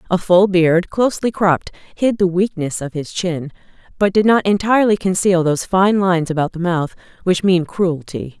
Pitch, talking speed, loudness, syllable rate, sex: 180 Hz, 180 wpm, -17 LUFS, 5.1 syllables/s, female